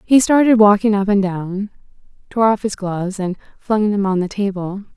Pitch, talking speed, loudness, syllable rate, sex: 200 Hz, 180 wpm, -17 LUFS, 5.1 syllables/s, female